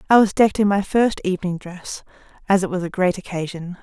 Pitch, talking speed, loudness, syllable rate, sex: 190 Hz, 220 wpm, -20 LUFS, 6.1 syllables/s, female